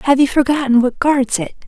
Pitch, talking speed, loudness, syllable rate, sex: 265 Hz, 215 wpm, -15 LUFS, 5.2 syllables/s, female